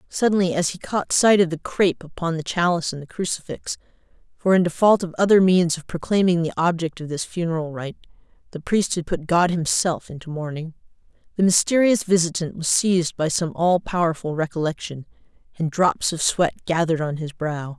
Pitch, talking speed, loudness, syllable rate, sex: 170 Hz, 175 wpm, -21 LUFS, 5.5 syllables/s, female